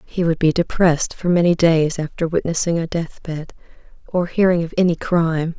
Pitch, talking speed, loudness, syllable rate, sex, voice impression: 165 Hz, 185 wpm, -19 LUFS, 5.3 syllables/s, female, feminine, middle-aged, slightly bright, clear, fluent, calm, reassuring, elegant, slightly sharp